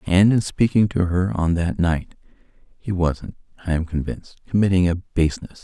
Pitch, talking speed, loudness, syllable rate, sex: 90 Hz, 170 wpm, -21 LUFS, 5.2 syllables/s, male